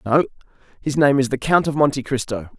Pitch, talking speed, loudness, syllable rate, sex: 135 Hz, 210 wpm, -20 LUFS, 6.0 syllables/s, male